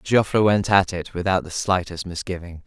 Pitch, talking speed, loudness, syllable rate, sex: 90 Hz, 180 wpm, -22 LUFS, 5.1 syllables/s, male